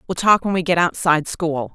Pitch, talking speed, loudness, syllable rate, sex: 170 Hz, 240 wpm, -18 LUFS, 5.8 syllables/s, female